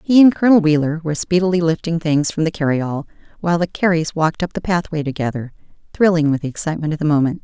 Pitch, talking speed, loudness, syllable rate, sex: 165 Hz, 210 wpm, -18 LUFS, 6.9 syllables/s, female